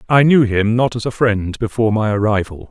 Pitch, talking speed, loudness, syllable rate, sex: 110 Hz, 220 wpm, -16 LUFS, 5.5 syllables/s, male